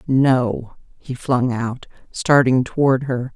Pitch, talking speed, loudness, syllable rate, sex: 125 Hz, 125 wpm, -18 LUFS, 3.3 syllables/s, female